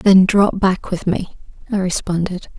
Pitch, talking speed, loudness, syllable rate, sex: 185 Hz, 160 wpm, -17 LUFS, 4.4 syllables/s, female